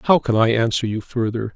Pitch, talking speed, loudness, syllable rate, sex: 120 Hz, 230 wpm, -19 LUFS, 5.8 syllables/s, male